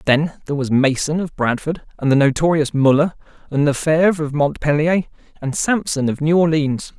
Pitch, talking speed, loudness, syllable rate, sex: 150 Hz, 165 wpm, -18 LUFS, 5.3 syllables/s, male